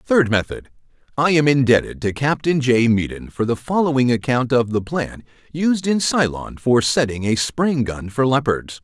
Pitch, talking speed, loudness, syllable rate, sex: 130 Hz, 170 wpm, -19 LUFS, 4.6 syllables/s, male